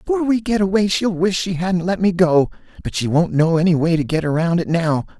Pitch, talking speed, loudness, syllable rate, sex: 175 Hz, 255 wpm, -18 LUFS, 5.8 syllables/s, male